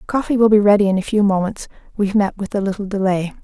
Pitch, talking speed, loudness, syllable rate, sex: 200 Hz, 245 wpm, -17 LUFS, 6.8 syllables/s, female